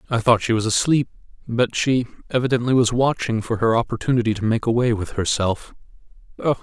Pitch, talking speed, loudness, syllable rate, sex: 115 Hz, 165 wpm, -20 LUFS, 5.9 syllables/s, male